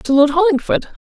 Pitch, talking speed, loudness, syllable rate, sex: 315 Hz, 175 wpm, -15 LUFS, 5.3 syllables/s, female